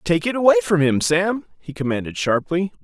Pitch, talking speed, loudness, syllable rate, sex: 170 Hz, 190 wpm, -19 LUFS, 5.4 syllables/s, male